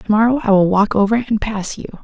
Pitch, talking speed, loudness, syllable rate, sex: 210 Hz, 235 wpm, -16 LUFS, 6.2 syllables/s, female